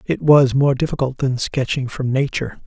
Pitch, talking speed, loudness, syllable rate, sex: 135 Hz, 180 wpm, -18 LUFS, 5.1 syllables/s, male